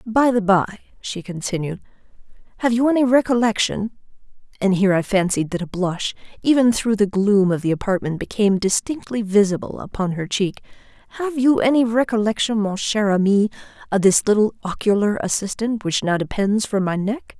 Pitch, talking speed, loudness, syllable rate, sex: 210 Hz, 160 wpm, -20 LUFS, 5.4 syllables/s, female